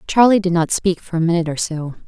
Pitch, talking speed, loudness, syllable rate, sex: 175 Hz, 260 wpm, -17 LUFS, 6.5 syllables/s, female